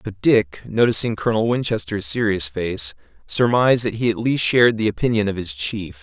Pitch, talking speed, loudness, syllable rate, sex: 105 Hz, 180 wpm, -19 LUFS, 5.4 syllables/s, male